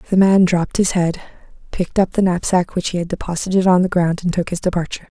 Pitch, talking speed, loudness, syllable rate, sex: 180 Hz, 230 wpm, -18 LUFS, 6.7 syllables/s, female